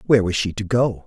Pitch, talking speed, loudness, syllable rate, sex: 105 Hz, 280 wpm, -20 LUFS, 6.2 syllables/s, male